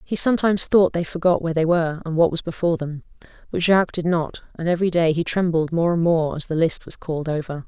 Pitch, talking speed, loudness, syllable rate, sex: 170 Hz, 240 wpm, -21 LUFS, 6.5 syllables/s, female